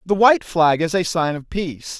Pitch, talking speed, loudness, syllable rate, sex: 175 Hz, 240 wpm, -19 LUFS, 5.3 syllables/s, male